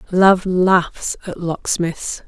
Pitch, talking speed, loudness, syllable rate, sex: 180 Hz, 105 wpm, -18 LUFS, 2.6 syllables/s, female